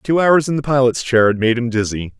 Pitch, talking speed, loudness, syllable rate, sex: 125 Hz, 275 wpm, -16 LUFS, 5.6 syllables/s, male